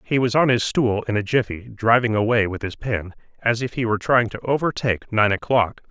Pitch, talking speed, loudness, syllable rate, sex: 115 Hz, 225 wpm, -21 LUFS, 5.6 syllables/s, male